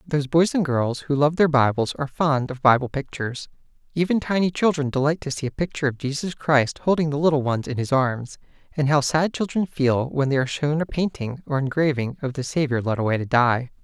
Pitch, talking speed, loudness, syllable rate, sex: 145 Hz, 220 wpm, -22 LUFS, 5.7 syllables/s, male